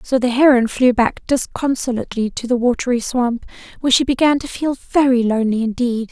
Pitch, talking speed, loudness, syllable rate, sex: 245 Hz, 175 wpm, -17 LUFS, 5.7 syllables/s, female